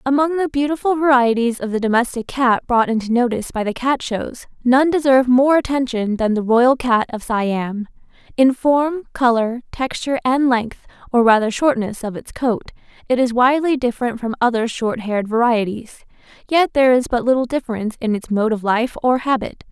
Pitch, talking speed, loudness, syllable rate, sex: 245 Hz, 180 wpm, -18 LUFS, 5.4 syllables/s, female